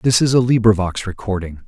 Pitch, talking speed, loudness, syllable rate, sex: 105 Hz, 180 wpm, -17 LUFS, 5.7 syllables/s, male